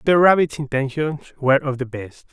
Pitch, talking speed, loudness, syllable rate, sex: 140 Hz, 180 wpm, -19 LUFS, 5.6 syllables/s, male